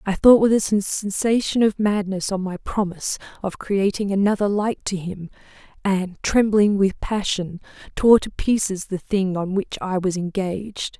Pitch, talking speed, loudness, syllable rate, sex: 195 Hz, 165 wpm, -21 LUFS, 4.5 syllables/s, female